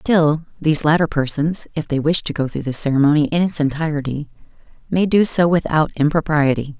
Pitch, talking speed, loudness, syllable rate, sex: 155 Hz, 175 wpm, -18 LUFS, 5.6 syllables/s, female